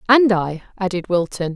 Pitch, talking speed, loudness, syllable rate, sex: 190 Hz, 155 wpm, -19 LUFS, 4.9 syllables/s, female